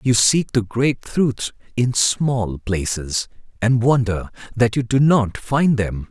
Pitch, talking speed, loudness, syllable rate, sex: 115 Hz, 155 wpm, -19 LUFS, 3.5 syllables/s, male